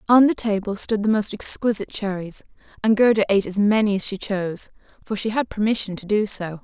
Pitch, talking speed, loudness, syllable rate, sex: 205 Hz, 210 wpm, -21 LUFS, 6.0 syllables/s, female